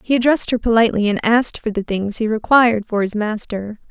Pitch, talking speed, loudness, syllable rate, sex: 220 Hz, 215 wpm, -17 LUFS, 6.2 syllables/s, female